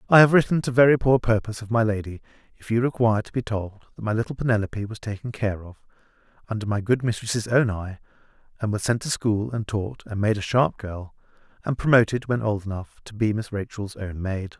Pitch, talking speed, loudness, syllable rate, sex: 110 Hz, 220 wpm, -24 LUFS, 5.9 syllables/s, male